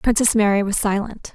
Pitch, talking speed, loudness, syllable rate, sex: 210 Hz, 180 wpm, -18 LUFS, 5.3 syllables/s, female